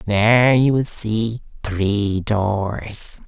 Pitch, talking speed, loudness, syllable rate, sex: 110 Hz, 110 wpm, -19 LUFS, 2.4 syllables/s, male